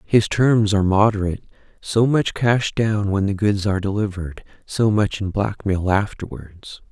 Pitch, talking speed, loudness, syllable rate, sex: 100 Hz, 155 wpm, -20 LUFS, 4.7 syllables/s, male